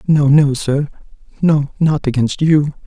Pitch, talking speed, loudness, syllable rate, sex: 145 Hz, 145 wpm, -15 LUFS, 3.8 syllables/s, male